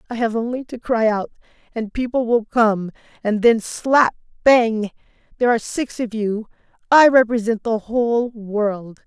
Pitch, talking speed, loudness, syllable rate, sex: 230 Hz, 160 wpm, -19 LUFS, 4.5 syllables/s, female